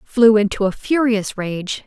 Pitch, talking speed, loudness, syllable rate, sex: 215 Hz, 160 wpm, -18 LUFS, 4.0 syllables/s, female